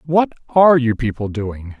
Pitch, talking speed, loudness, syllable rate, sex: 125 Hz, 165 wpm, -17 LUFS, 4.8 syllables/s, male